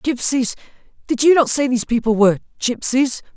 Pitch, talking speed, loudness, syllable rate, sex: 245 Hz, 160 wpm, -17 LUFS, 5.6 syllables/s, male